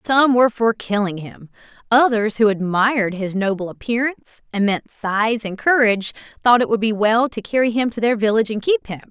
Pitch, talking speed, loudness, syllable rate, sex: 220 Hz, 190 wpm, -18 LUFS, 5.5 syllables/s, female